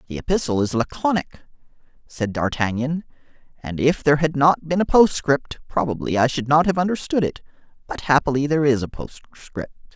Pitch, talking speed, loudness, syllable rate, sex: 145 Hz, 165 wpm, -21 LUFS, 5.6 syllables/s, male